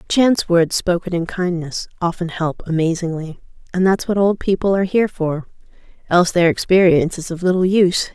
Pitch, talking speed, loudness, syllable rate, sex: 175 Hz, 160 wpm, -18 LUFS, 5.7 syllables/s, female